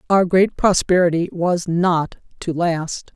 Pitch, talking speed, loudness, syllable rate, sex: 175 Hz, 135 wpm, -18 LUFS, 3.7 syllables/s, female